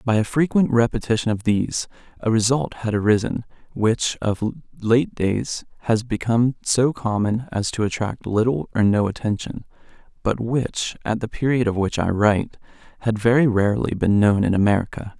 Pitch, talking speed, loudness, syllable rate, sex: 110 Hz, 160 wpm, -21 LUFS, 5.1 syllables/s, male